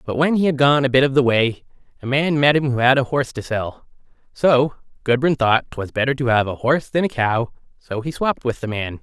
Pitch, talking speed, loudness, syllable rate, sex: 130 Hz, 255 wpm, -19 LUFS, 5.7 syllables/s, male